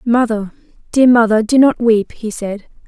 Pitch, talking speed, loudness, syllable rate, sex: 230 Hz, 165 wpm, -14 LUFS, 4.5 syllables/s, female